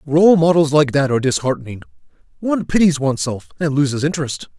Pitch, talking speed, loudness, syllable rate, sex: 145 Hz, 155 wpm, -17 LUFS, 6.5 syllables/s, male